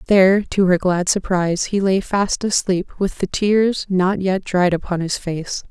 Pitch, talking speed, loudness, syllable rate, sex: 190 Hz, 190 wpm, -18 LUFS, 4.2 syllables/s, female